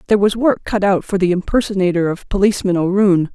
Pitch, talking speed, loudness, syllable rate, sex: 195 Hz, 195 wpm, -16 LUFS, 6.4 syllables/s, female